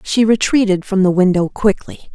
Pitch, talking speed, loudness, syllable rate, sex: 200 Hz, 170 wpm, -14 LUFS, 4.9 syllables/s, female